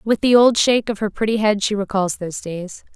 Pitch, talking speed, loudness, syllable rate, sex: 210 Hz, 245 wpm, -18 LUFS, 5.8 syllables/s, female